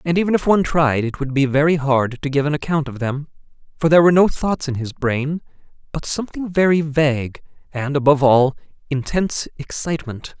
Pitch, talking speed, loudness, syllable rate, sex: 150 Hz, 190 wpm, -18 LUFS, 5.8 syllables/s, male